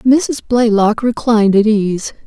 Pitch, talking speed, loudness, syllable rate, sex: 225 Hz, 130 wpm, -13 LUFS, 3.9 syllables/s, female